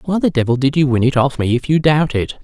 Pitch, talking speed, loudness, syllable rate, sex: 135 Hz, 320 wpm, -15 LUFS, 6.1 syllables/s, male